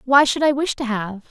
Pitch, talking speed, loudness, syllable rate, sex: 255 Hz, 275 wpm, -19 LUFS, 5.2 syllables/s, female